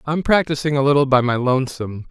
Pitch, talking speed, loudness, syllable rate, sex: 140 Hz, 200 wpm, -18 LUFS, 6.6 syllables/s, male